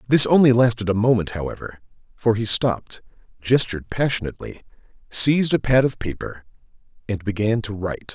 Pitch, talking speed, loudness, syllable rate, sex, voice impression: 115 Hz, 145 wpm, -20 LUFS, 5.8 syllables/s, male, masculine, middle-aged, tensed, powerful, fluent, intellectual, calm, mature, friendly, unique, wild, lively, slightly strict